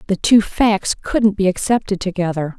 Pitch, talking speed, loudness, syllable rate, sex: 195 Hz, 160 wpm, -17 LUFS, 4.7 syllables/s, female